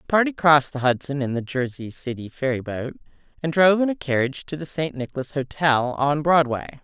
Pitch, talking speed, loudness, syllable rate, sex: 140 Hz, 195 wpm, -22 LUFS, 5.8 syllables/s, female